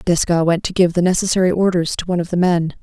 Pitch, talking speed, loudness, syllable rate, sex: 175 Hz, 255 wpm, -17 LUFS, 6.8 syllables/s, female